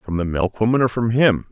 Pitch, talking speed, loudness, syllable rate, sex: 110 Hz, 240 wpm, -19 LUFS, 5.5 syllables/s, male